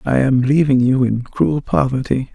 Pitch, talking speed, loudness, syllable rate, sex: 130 Hz, 180 wpm, -16 LUFS, 4.5 syllables/s, male